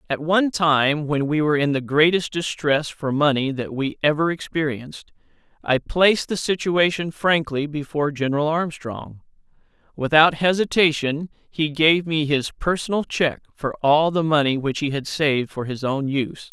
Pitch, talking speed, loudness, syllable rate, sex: 150 Hz, 160 wpm, -21 LUFS, 4.8 syllables/s, male